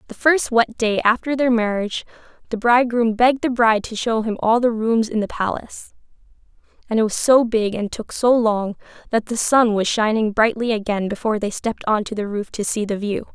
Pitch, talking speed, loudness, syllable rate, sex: 225 Hz, 215 wpm, -19 LUFS, 5.6 syllables/s, female